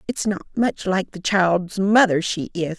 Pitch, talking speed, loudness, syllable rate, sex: 190 Hz, 195 wpm, -20 LUFS, 4.1 syllables/s, female